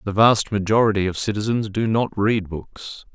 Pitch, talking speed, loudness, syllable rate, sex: 105 Hz, 170 wpm, -20 LUFS, 4.7 syllables/s, male